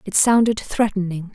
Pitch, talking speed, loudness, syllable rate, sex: 205 Hz, 135 wpm, -19 LUFS, 4.9 syllables/s, female